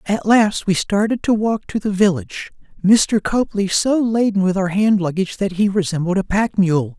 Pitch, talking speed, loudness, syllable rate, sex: 200 Hz, 195 wpm, -17 LUFS, 4.9 syllables/s, male